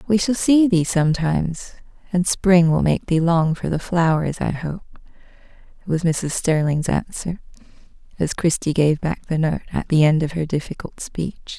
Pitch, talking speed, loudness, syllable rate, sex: 170 Hz, 170 wpm, -20 LUFS, 4.6 syllables/s, female